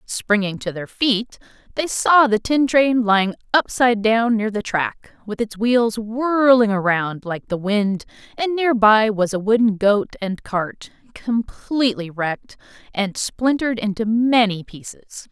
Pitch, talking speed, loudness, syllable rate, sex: 220 Hz, 155 wpm, -19 LUFS, 4.0 syllables/s, female